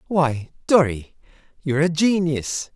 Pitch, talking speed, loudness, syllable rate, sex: 150 Hz, 110 wpm, -21 LUFS, 4.0 syllables/s, male